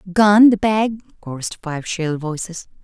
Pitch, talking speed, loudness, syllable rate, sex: 185 Hz, 125 wpm, -18 LUFS, 4.4 syllables/s, female